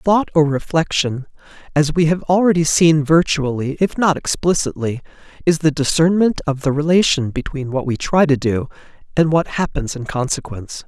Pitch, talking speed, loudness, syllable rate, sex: 155 Hz, 160 wpm, -17 LUFS, 5.1 syllables/s, male